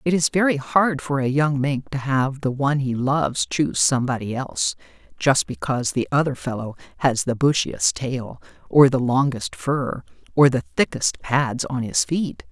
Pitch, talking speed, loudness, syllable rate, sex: 130 Hz, 175 wpm, -21 LUFS, 4.7 syllables/s, female